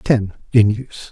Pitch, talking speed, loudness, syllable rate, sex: 110 Hz, 160 wpm, -17 LUFS, 6.2 syllables/s, male